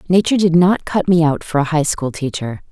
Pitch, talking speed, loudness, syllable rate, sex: 160 Hz, 220 wpm, -16 LUFS, 5.7 syllables/s, female